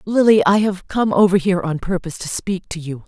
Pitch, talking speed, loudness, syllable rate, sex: 185 Hz, 235 wpm, -18 LUFS, 5.4 syllables/s, female